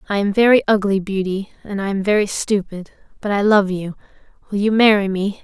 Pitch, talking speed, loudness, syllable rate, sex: 200 Hz, 200 wpm, -18 LUFS, 5.6 syllables/s, female